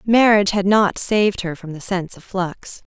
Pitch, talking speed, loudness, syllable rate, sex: 195 Hz, 205 wpm, -18 LUFS, 5.1 syllables/s, female